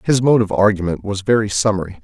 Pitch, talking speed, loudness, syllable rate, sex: 100 Hz, 205 wpm, -17 LUFS, 6.2 syllables/s, male